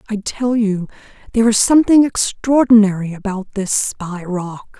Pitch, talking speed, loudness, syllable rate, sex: 210 Hz, 140 wpm, -16 LUFS, 4.6 syllables/s, female